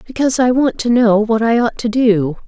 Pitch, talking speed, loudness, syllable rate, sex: 230 Hz, 240 wpm, -14 LUFS, 5.3 syllables/s, female